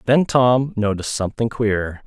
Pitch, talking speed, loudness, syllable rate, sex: 115 Hz, 145 wpm, -19 LUFS, 4.8 syllables/s, male